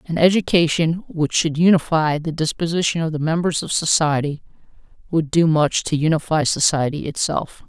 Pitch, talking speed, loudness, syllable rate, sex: 160 Hz, 150 wpm, -19 LUFS, 5.2 syllables/s, female